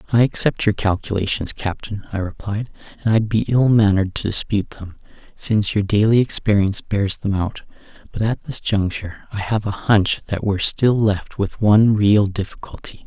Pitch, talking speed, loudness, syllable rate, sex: 105 Hz, 175 wpm, -19 LUFS, 5.3 syllables/s, male